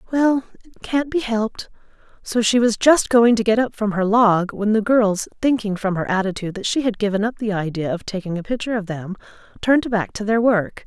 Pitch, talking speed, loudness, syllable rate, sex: 215 Hz, 225 wpm, -19 LUFS, 5.6 syllables/s, female